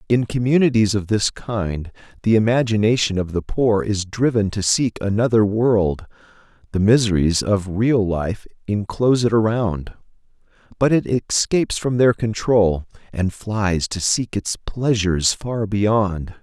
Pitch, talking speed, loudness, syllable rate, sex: 105 Hz, 140 wpm, -19 LUFS, 4.2 syllables/s, male